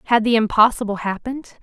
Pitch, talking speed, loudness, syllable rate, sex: 225 Hz, 145 wpm, -18 LUFS, 6.3 syllables/s, female